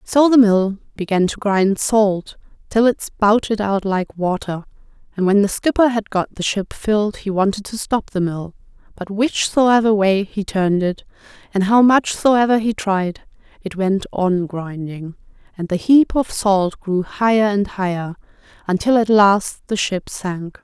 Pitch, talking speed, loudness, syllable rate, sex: 200 Hz, 170 wpm, -18 LUFS, 4.2 syllables/s, female